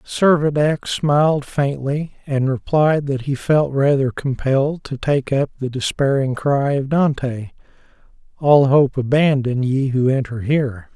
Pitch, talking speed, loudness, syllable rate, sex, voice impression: 140 Hz, 135 wpm, -18 LUFS, 4.1 syllables/s, male, masculine, adult-like, relaxed, slightly weak, slightly hard, raspy, calm, friendly, reassuring, kind, modest